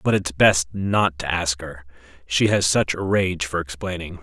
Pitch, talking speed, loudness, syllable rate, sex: 85 Hz, 215 wpm, -21 LUFS, 4.6 syllables/s, male